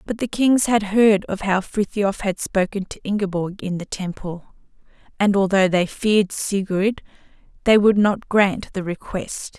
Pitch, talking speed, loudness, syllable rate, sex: 200 Hz, 165 wpm, -20 LUFS, 4.3 syllables/s, female